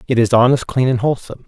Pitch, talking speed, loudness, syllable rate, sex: 120 Hz, 245 wpm, -15 LUFS, 7.6 syllables/s, male